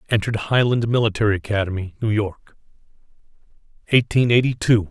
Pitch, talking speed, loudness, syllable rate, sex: 110 Hz, 110 wpm, -20 LUFS, 6.1 syllables/s, male